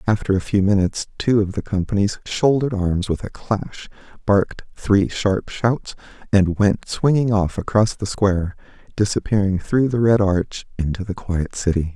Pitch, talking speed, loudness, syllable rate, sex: 100 Hz, 165 wpm, -20 LUFS, 4.7 syllables/s, male